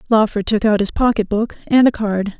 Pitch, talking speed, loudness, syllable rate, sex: 215 Hz, 225 wpm, -17 LUFS, 5.3 syllables/s, female